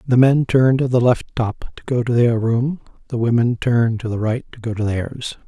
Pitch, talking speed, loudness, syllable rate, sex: 120 Hz, 240 wpm, -18 LUFS, 5.2 syllables/s, male